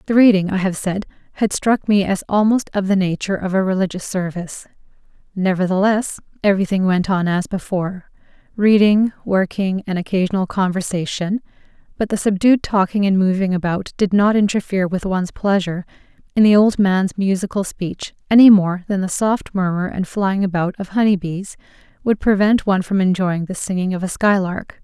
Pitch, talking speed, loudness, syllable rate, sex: 195 Hz, 165 wpm, -18 LUFS, 5.4 syllables/s, female